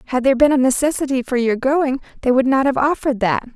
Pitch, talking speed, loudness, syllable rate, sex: 265 Hz, 235 wpm, -17 LUFS, 6.6 syllables/s, female